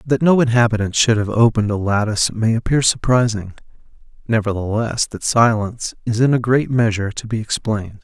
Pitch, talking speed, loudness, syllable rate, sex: 110 Hz, 165 wpm, -17 LUFS, 5.8 syllables/s, male